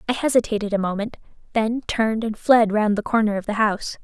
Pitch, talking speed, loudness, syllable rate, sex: 220 Hz, 210 wpm, -21 LUFS, 6.0 syllables/s, female